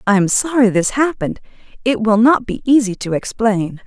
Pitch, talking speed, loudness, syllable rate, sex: 225 Hz, 185 wpm, -16 LUFS, 5.3 syllables/s, female